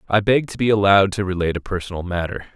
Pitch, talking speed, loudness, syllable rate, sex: 95 Hz, 235 wpm, -19 LUFS, 7.4 syllables/s, male